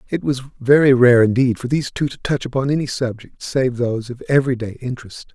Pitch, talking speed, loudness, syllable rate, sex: 130 Hz, 200 wpm, -18 LUFS, 6.1 syllables/s, male